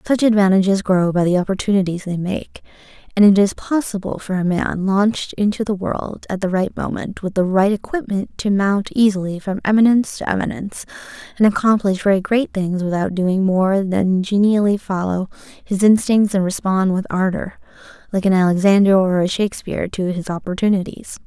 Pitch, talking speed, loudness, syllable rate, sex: 195 Hz, 170 wpm, -18 LUFS, 5.3 syllables/s, female